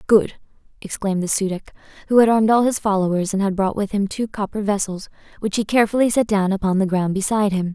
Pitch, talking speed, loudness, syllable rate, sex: 205 Hz, 225 wpm, -19 LUFS, 6.5 syllables/s, female